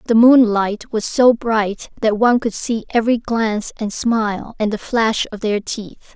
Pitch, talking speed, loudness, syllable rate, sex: 220 Hz, 185 wpm, -17 LUFS, 4.5 syllables/s, female